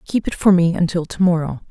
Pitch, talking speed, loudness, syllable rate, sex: 175 Hz, 245 wpm, -17 LUFS, 5.9 syllables/s, female